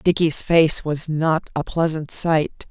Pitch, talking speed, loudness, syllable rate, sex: 160 Hz, 155 wpm, -20 LUFS, 3.5 syllables/s, female